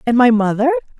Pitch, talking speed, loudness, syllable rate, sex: 230 Hz, 180 wpm, -15 LUFS, 6.5 syllables/s, female